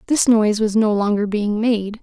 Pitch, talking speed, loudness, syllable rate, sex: 215 Hz, 205 wpm, -18 LUFS, 4.9 syllables/s, female